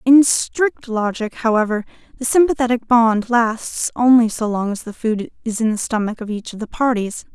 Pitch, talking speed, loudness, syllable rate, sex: 230 Hz, 190 wpm, -18 LUFS, 4.8 syllables/s, female